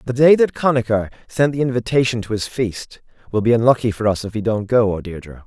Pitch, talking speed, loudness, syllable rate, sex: 115 Hz, 230 wpm, -18 LUFS, 6.0 syllables/s, male